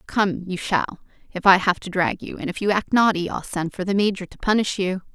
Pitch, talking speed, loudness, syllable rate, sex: 190 Hz, 255 wpm, -22 LUFS, 5.5 syllables/s, female